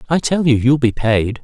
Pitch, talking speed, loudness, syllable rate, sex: 130 Hz, 250 wpm, -15 LUFS, 4.9 syllables/s, male